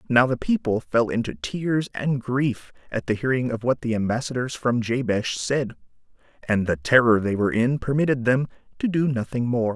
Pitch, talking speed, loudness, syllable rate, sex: 120 Hz, 185 wpm, -23 LUFS, 5.0 syllables/s, male